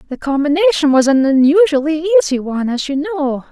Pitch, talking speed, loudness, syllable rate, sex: 300 Hz, 170 wpm, -14 LUFS, 6.2 syllables/s, female